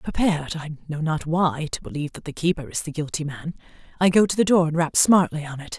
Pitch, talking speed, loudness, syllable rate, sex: 160 Hz, 220 wpm, -22 LUFS, 6.1 syllables/s, female